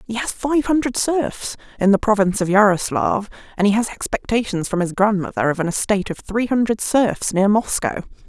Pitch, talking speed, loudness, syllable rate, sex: 210 Hz, 190 wpm, -19 LUFS, 5.4 syllables/s, female